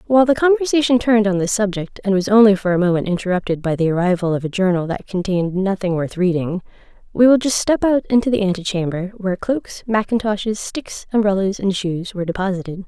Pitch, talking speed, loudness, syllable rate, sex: 200 Hz, 195 wpm, -18 LUFS, 6.1 syllables/s, female